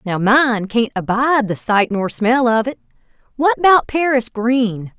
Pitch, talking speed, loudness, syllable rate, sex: 235 Hz, 170 wpm, -16 LUFS, 4.0 syllables/s, female